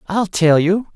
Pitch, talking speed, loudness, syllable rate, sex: 185 Hz, 190 wpm, -15 LUFS, 3.7 syllables/s, male